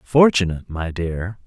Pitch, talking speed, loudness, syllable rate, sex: 95 Hz, 125 wpm, -20 LUFS, 4.7 syllables/s, male